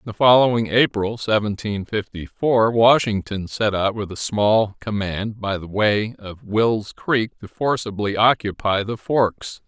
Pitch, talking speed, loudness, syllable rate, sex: 105 Hz, 155 wpm, -20 LUFS, 3.7 syllables/s, male